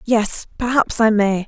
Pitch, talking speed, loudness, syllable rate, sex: 220 Hz, 160 wpm, -17 LUFS, 4.0 syllables/s, female